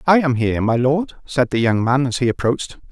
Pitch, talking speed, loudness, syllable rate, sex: 130 Hz, 245 wpm, -18 LUFS, 5.8 syllables/s, male